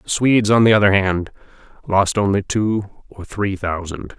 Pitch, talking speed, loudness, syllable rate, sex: 100 Hz, 170 wpm, -17 LUFS, 4.7 syllables/s, male